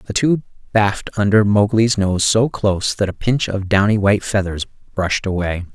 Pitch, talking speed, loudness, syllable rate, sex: 105 Hz, 180 wpm, -17 LUFS, 5.1 syllables/s, male